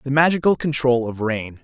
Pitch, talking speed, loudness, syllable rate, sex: 135 Hz, 185 wpm, -19 LUFS, 5.2 syllables/s, male